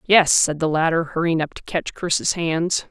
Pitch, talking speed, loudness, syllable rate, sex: 165 Hz, 205 wpm, -20 LUFS, 4.3 syllables/s, female